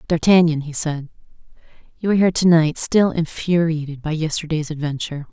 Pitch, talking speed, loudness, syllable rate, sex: 160 Hz, 145 wpm, -19 LUFS, 5.8 syllables/s, female